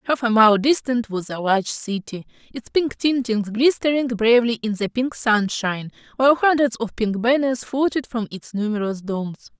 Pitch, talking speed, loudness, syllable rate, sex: 230 Hz, 170 wpm, -20 LUFS, 5.0 syllables/s, female